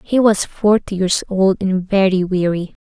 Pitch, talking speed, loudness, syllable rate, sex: 195 Hz, 170 wpm, -16 LUFS, 4.3 syllables/s, female